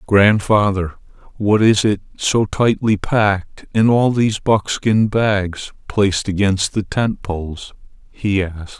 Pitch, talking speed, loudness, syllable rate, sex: 100 Hz, 130 wpm, -17 LUFS, 3.9 syllables/s, male